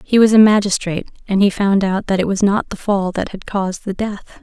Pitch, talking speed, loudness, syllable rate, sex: 200 Hz, 260 wpm, -16 LUFS, 5.5 syllables/s, female